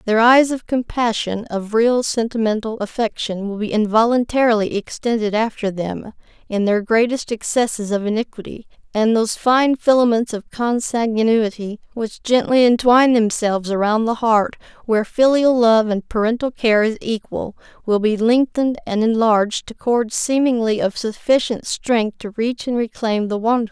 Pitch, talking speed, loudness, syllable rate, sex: 225 Hz, 145 wpm, -18 LUFS, 4.9 syllables/s, female